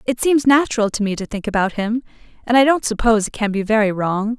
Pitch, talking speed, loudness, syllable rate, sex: 225 Hz, 245 wpm, -18 LUFS, 6.2 syllables/s, female